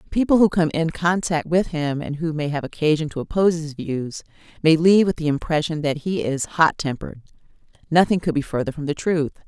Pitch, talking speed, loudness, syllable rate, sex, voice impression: 160 Hz, 210 wpm, -21 LUFS, 5.7 syllables/s, female, feminine, adult-like, tensed, powerful, bright, clear, fluent, intellectual, calm, reassuring, elegant, slightly lively, slightly sharp